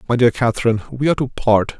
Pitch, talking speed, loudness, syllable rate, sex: 120 Hz, 235 wpm, -18 LUFS, 7.2 syllables/s, male